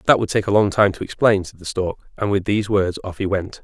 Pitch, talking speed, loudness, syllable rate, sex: 100 Hz, 295 wpm, -20 LUFS, 6.2 syllables/s, male